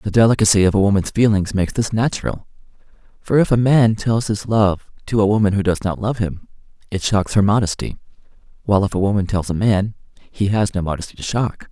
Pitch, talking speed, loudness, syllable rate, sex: 105 Hz, 210 wpm, -18 LUFS, 6.0 syllables/s, male